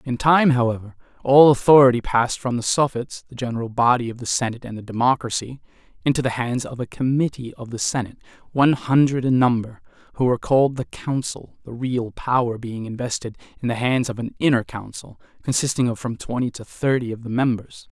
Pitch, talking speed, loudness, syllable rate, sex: 125 Hz, 190 wpm, -21 LUFS, 6.0 syllables/s, male